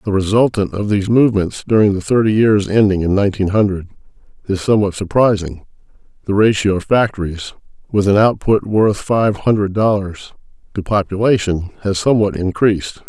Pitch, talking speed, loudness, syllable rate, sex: 100 Hz, 145 wpm, -15 LUFS, 5.0 syllables/s, male